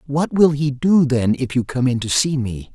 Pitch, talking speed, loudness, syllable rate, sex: 135 Hz, 260 wpm, -18 LUFS, 4.7 syllables/s, male